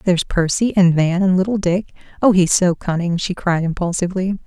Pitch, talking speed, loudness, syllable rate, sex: 185 Hz, 175 wpm, -17 LUFS, 5.6 syllables/s, female